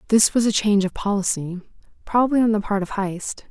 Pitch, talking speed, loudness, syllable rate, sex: 205 Hz, 205 wpm, -21 LUFS, 6.0 syllables/s, female